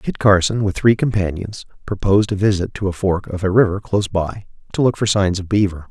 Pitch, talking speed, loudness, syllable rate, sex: 100 Hz, 225 wpm, -18 LUFS, 5.8 syllables/s, male